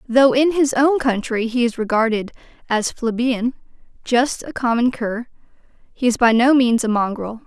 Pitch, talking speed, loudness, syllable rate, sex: 240 Hz, 170 wpm, -18 LUFS, 4.7 syllables/s, female